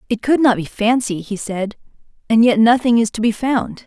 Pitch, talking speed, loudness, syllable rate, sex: 230 Hz, 215 wpm, -17 LUFS, 5.1 syllables/s, female